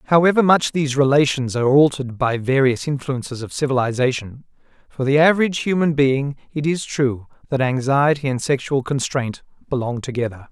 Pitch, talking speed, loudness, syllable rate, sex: 135 Hz, 150 wpm, -19 LUFS, 5.7 syllables/s, male